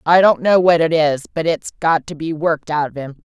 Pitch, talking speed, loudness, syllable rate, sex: 160 Hz, 275 wpm, -16 LUFS, 5.4 syllables/s, female